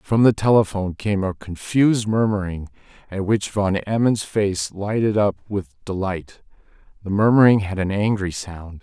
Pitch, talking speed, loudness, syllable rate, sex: 100 Hz, 150 wpm, -20 LUFS, 4.6 syllables/s, male